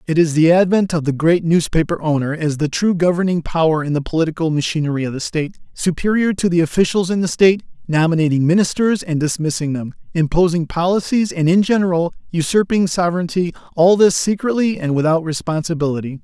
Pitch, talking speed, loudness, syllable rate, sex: 170 Hz, 165 wpm, -17 LUFS, 6.1 syllables/s, male